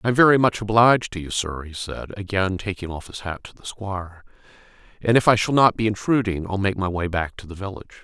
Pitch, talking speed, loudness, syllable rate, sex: 100 Hz, 240 wpm, -22 LUFS, 6.0 syllables/s, male